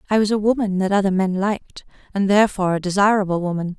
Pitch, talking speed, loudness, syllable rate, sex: 195 Hz, 205 wpm, -19 LUFS, 6.9 syllables/s, female